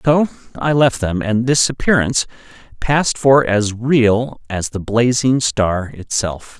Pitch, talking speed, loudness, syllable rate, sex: 120 Hz, 145 wpm, -16 LUFS, 3.9 syllables/s, male